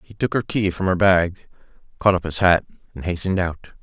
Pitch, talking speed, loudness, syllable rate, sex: 90 Hz, 220 wpm, -20 LUFS, 5.7 syllables/s, male